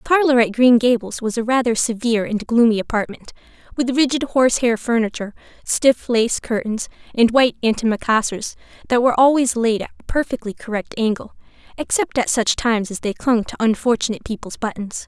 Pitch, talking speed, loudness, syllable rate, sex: 235 Hz, 165 wpm, -19 LUFS, 5.9 syllables/s, female